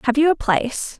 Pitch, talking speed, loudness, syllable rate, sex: 270 Hz, 240 wpm, -19 LUFS, 5.9 syllables/s, female